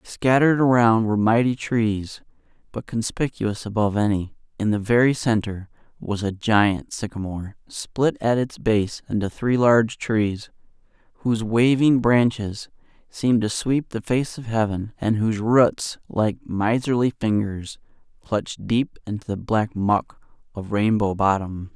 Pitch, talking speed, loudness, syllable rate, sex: 110 Hz, 140 wpm, -22 LUFS, 4.3 syllables/s, male